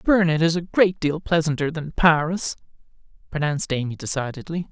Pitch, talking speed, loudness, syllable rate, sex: 160 Hz, 140 wpm, -22 LUFS, 5.4 syllables/s, male